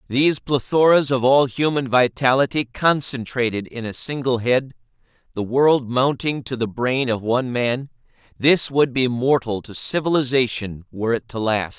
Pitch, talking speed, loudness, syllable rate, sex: 125 Hz, 150 wpm, -20 LUFS, 4.7 syllables/s, male